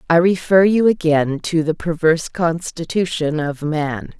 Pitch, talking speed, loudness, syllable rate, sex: 165 Hz, 145 wpm, -18 LUFS, 4.3 syllables/s, female